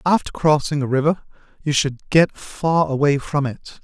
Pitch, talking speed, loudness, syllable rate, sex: 150 Hz, 170 wpm, -20 LUFS, 4.6 syllables/s, male